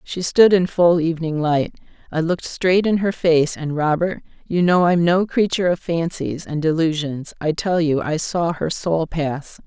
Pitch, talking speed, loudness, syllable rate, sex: 165 Hz, 190 wpm, -19 LUFS, 4.5 syllables/s, female